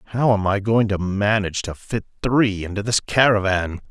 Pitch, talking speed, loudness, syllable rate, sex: 105 Hz, 185 wpm, -20 LUFS, 5.0 syllables/s, male